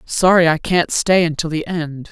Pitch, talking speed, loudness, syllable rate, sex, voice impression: 165 Hz, 200 wpm, -16 LUFS, 4.5 syllables/s, female, masculine, slightly gender-neutral, adult-like, thick, tensed, slightly weak, slightly dark, slightly hard, slightly clear, slightly halting, cool, very intellectual, refreshing, very sincere, calm, slightly friendly, slightly reassuring, very unique, elegant, wild, slightly sweet, lively, strict, slightly intense, slightly sharp